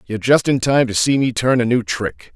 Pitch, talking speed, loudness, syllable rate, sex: 120 Hz, 280 wpm, -17 LUFS, 5.4 syllables/s, male